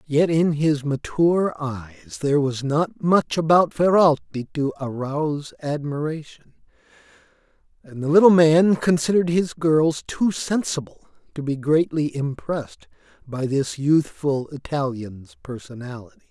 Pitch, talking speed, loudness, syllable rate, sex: 145 Hz, 120 wpm, -21 LUFS, 4.4 syllables/s, male